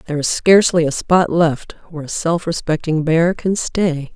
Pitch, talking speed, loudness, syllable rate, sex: 165 Hz, 190 wpm, -16 LUFS, 5.0 syllables/s, female